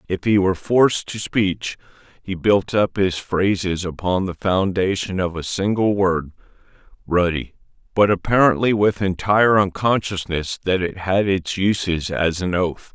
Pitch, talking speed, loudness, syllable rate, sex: 95 Hz, 150 wpm, -20 LUFS, 4.4 syllables/s, male